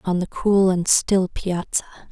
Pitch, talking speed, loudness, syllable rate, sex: 185 Hz, 170 wpm, -20 LUFS, 4.9 syllables/s, female